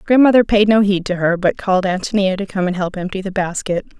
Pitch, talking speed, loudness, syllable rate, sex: 195 Hz, 240 wpm, -16 LUFS, 6.1 syllables/s, female